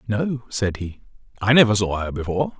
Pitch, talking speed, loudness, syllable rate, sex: 110 Hz, 185 wpm, -21 LUFS, 5.6 syllables/s, male